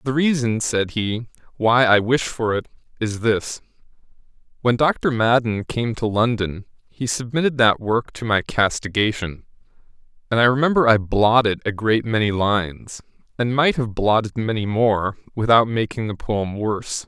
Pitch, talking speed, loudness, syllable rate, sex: 115 Hz, 155 wpm, -20 LUFS, 4.6 syllables/s, male